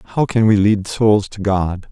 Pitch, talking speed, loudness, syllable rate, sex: 105 Hz, 220 wpm, -16 LUFS, 4.5 syllables/s, male